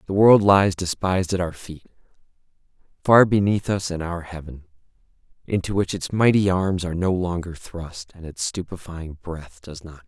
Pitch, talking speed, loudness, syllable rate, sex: 90 Hz, 175 wpm, -21 LUFS, 4.9 syllables/s, male